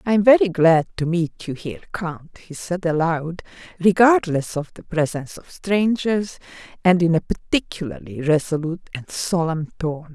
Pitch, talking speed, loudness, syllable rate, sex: 170 Hz, 155 wpm, -21 LUFS, 4.8 syllables/s, female